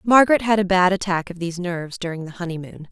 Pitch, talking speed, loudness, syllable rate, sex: 180 Hz, 225 wpm, -20 LUFS, 6.8 syllables/s, female